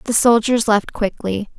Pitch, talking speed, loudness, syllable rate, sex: 220 Hz, 150 wpm, -17 LUFS, 4.4 syllables/s, female